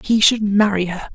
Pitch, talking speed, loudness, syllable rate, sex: 205 Hz, 210 wpm, -17 LUFS, 5.0 syllables/s, female